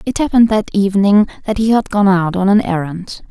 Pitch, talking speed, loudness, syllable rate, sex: 200 Hz, 220 wpm, -14 LUFS, 5.8 syllables/s, female